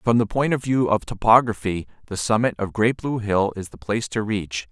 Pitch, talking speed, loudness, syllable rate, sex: 110 Hz, 230 wpm, -22 LUFS, 5.3 syllables/s, male